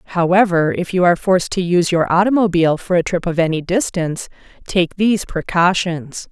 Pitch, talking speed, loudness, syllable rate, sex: 175 Hz, 170 wpm, -16 LUFS, 5.9 syllables/s, female